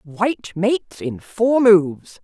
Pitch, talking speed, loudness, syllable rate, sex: 200 Hz, 135 wpm, -17 LUFS, 3.8 syllables/s, female